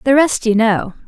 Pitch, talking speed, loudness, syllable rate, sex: 235 Hz, 225 wpm, -15 LUFS, 4.8 syllables/s, female